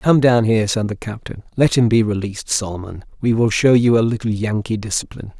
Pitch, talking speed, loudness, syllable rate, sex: 110 Hz, 210 wpm, -18 LUFS, 5.9 syllables/s, male